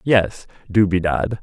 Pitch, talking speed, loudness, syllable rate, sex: 95 Hz, 125 wpm, -19 LUFS, 3.7 syllables/s, male